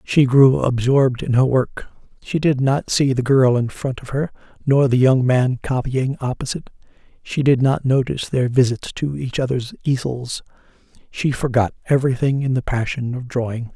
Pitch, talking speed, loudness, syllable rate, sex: 130 Hz, 175 wpm, -19 LUFS, 4.9 syllables/s, male